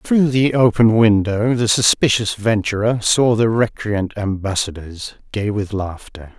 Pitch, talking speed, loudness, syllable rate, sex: 110 Hz, 130 wpm, -17 LUFS, 4.1 syllables/s, male